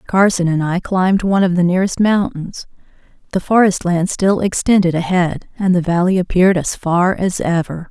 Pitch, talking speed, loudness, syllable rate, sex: 180 Hz, 175 wpm, -15 LUFS, 5.3 syllables/s, female